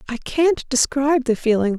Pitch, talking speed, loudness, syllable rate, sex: 265 Hz, 170 wpm, -19 LUFS, 5.1 syllables/s, female